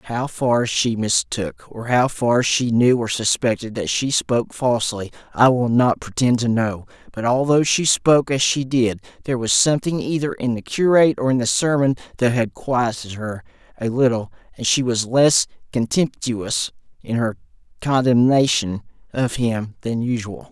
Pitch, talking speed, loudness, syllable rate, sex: 120 Hz, 165 wpm, -19 LUFS, 4.7 syllables/s, male